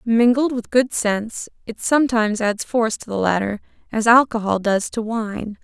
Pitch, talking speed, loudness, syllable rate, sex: 225 Hz, 170 wpm, -19 LUFS, 5.0 syllables/s, female